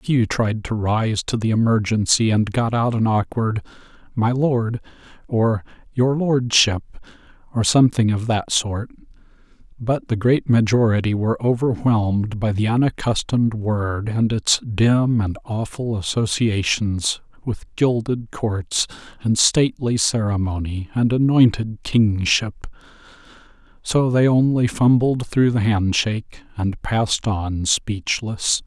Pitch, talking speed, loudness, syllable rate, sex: 110 Hz, 125 wpm, -20 LUFS, 4.1 syllables/s, male